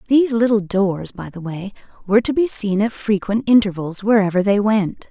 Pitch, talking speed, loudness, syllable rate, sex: 205 Hz, 190 wpm, -18 LUFS, 5.3 syllables/s, female